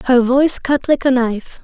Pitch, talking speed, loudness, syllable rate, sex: 260 Hz, 220 wpm, -15 LUFS, 5.5 syllables/s, female